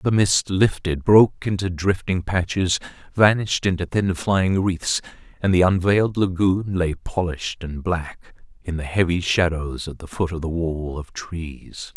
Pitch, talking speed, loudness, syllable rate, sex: 90 Hz, 160 wpm, -21 LUFS, 4.3 syllables/s, male